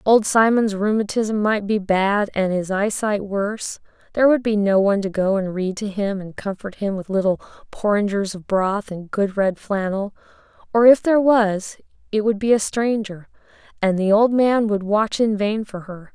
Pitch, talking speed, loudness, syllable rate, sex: 205 Hz, 195 wpm, -20 LUFS, 4.8 syllables/s, female